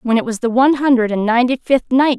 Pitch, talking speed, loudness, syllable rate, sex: 245 Hz, 275 wpm, -15 LUFS, 6.5 syllables/s, female